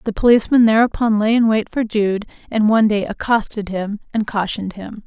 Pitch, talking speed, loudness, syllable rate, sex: 215 Hz, 190 wpm, -17 LUFS, 5.6 syllables/s, female